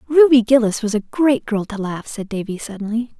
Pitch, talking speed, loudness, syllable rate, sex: 225 Hz, 205 wpm, -18 LUFS, 5.3 syllables/s, female